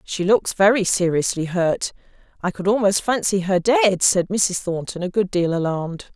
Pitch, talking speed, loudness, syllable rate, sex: 190 Hz, 165 wpm, -20 LUFS, 4.7 syllables/s, female